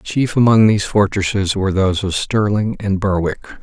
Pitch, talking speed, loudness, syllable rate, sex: 100 Hz, 165 wpm, -16 LUFS, 5.4 syllables/s, male